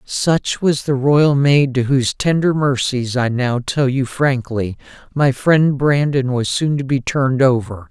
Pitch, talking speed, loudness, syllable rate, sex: 135 Hz, 175 wpm, -16 LUFS, 4.0 syllables/s, male